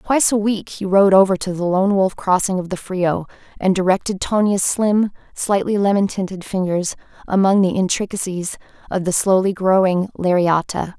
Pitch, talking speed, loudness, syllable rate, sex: 190 Hz, 165 wpm, -18 LUFS, 5.0 syllables/s, female